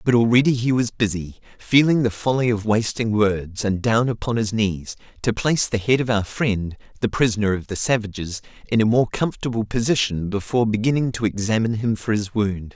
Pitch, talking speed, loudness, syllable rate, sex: 110 Hz, 195 wpm, -21 LUFS, 5.6 syllables/s, male